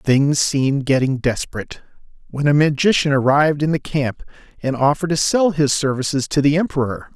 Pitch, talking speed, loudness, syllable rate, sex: 140 Hz, 170 wpm, -18 LUFS, 5.6 syllables/s, male